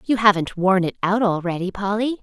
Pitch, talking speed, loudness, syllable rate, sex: 200 Hz, 190 wpm, -20 LUFS, 5.4 syllables/s, female